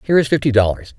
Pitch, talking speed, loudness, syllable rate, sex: 130 Hz, 245 wpm, -16 LUFS, 8.0 syllables/s, male